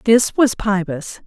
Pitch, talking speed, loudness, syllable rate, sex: 205 Hz, 140 wpm, -18 LUFS, 3.6 syllables/s, female